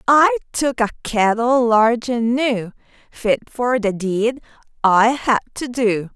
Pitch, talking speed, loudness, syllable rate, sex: 235 Hz, 145 wpm, -18 LUFS, 3.6 syllables/s, female